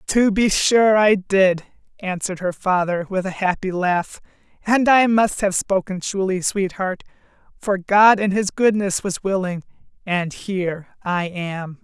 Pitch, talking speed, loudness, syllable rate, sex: 190 Hz, 150 wpm, -19 LUFS, 4.1 syllables/s, female